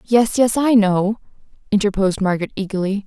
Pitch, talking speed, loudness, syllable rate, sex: 205 Hz, 135 wpm, -18 LUFS, 5.8 syllables/s, female